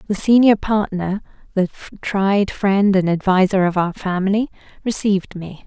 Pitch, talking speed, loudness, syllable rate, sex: 195 Hz, 115 wpm, -18 LUFS, 4.7 syllables/s, female